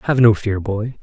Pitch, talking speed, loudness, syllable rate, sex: 110 Hz, 235 wpm, -17 LUFS, 4.7 syllables/s, male